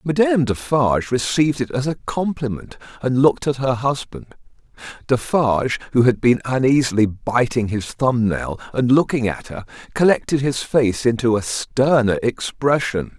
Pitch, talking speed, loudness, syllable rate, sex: 125 Hz, 145 wpm, -19 LUFS, 4.8 syllables/s, male